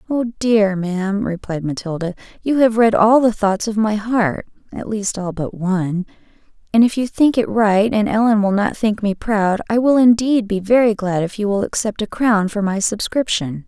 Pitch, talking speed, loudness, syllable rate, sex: 210 Hz, 205 wpm, -17 LUFS, 4.5 syllables/s, female